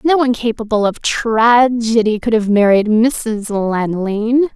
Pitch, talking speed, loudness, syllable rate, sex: 225 Hz, 130 wpm, -14 LUFS, 4.3 syllables/s, female